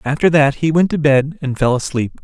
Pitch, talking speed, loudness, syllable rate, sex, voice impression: 145 Hz, 240 wpm, -15 LUFS, 5.2 syllables/s, male, masculine, adult-like, tensed, slightly powerful, clear, fluent, intellectual, sincere, friendly, slightly wild, lively, slightly strict, slightly sharp